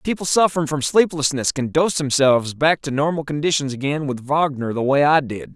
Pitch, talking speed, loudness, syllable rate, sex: 145 Hz, 195 wpm, -19 LUFS, 5.5 syllables/s, male